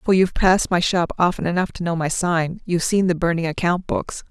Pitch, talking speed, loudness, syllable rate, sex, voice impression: 175 Hz, 235 wpm, -20 LUFS, 5.9 syllables/s, female, feminine, adult-like, slightly relaxed, slightly soft, fluent, raspy, intellectual, calm, reassuring, slightly sharp, slightly modest